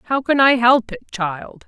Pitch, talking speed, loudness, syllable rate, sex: 235 Hz, 215 wpm, -16 LUFS, 3.7 syllables/s, female